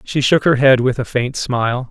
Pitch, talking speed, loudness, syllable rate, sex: 130 Hz, 250 wpm, -15 LUFS, 5.0 syllables/s, male